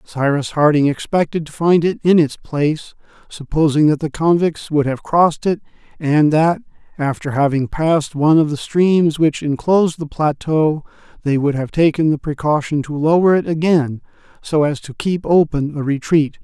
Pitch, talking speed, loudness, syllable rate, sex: 155 Hz, 170 wpm, -17 LUFS, 4.9 syllables/s, male